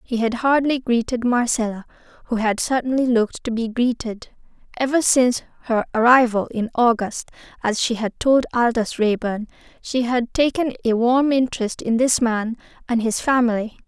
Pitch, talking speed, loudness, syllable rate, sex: 240 Hz, 155 wpm, -20 LUFS, 5.0 syllables/s, female